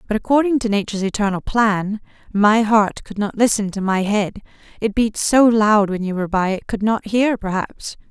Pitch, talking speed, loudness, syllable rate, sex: 210 Hz, 190 wpm, -18 LUFS, 5.0 syllables/s, female